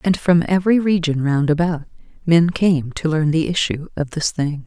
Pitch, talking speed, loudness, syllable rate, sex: 165 Hz, 195 wpm, -18 LUFS, 4.9 syllables/s, female